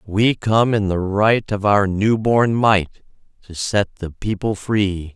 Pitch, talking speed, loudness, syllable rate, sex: 100 Hz, 175 wpm, -18 LUFS, 3.5 syllables/s, male